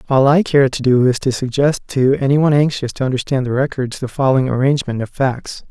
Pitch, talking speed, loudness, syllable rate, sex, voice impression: 135 Hz, 220 wpm, -16 LUFS, 6.1 syllables/s, male, masculine, adult-like, slightly relaxed, powerful, slightly soft, slightly muffled, intellectual, calm, friendly, reassuring, slightly wild, kind, modest